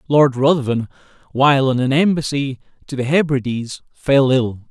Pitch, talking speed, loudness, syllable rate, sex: 135 Hz, 140 wpm, -17 LUFS, 4.5 syllables/s, male